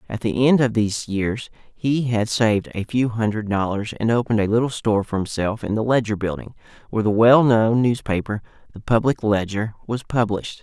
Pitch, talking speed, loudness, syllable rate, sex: 110 Hz, 185 wpm, -20 LUFS, 5.5 syllables/s, male